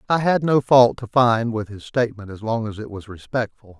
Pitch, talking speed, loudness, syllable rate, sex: 115 Hz, 235 wpm, -20 LUFS, 5.3 syllables/s, male